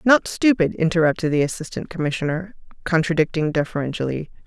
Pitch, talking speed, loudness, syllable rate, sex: 165 Hz, 110 wpm, -21 LUFS, 6.1 syllables/s, female